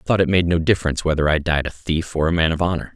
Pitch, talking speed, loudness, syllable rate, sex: 85 Hz, 325 wpm, -19 LUFS, 7.4 syllables/s, male